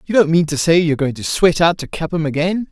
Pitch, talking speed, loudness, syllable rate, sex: 165 Hz, 285 wpm, -16 LUFS, 6.2 syllables/s, male